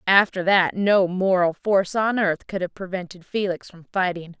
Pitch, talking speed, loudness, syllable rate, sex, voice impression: 185 Hz, 175 wpm, -22 LUFS, 4.8 syllables/s, female, feminine, adult-like, tensed, powerful, bright, clear, fluent, intellectual, friendly, elegant, lively, sharp